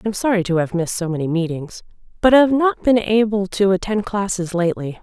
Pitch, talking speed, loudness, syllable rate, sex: 195 Hz, 205 wpm, -18 LUFS, 5.7 syllables/s, female